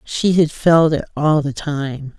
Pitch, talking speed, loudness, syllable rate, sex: 150 Hz, 190 wpm, -17 LUFS, 3.6 syllables/s, female